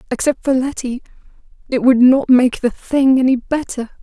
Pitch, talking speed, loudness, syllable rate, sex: 255 Hz, 165 wpm, -15 LUFS, 4.8 syllables/s, female